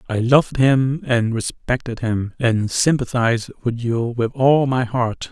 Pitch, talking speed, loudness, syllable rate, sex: 120 Hz, 160 wpm, -19 LUFS, 4.1 syllables/s, male